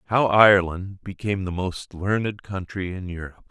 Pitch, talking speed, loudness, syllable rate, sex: 95 Hz, 155 wpm, -22 LUFS, 5.3 syllables/s, male